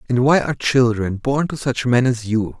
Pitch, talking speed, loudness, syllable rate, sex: 125 Hz, 230 wpm, -18 LUFS, 5.0 syllables/s, male